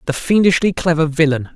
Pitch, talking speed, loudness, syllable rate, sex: 160 Hz, 155 wpm, -15 LUFS, 5.8 syllables/s, male